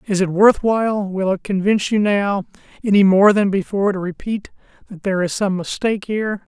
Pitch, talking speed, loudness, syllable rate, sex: 200 Hz, 190 wpm, -18 LUFS, 5.7 syllables/s, male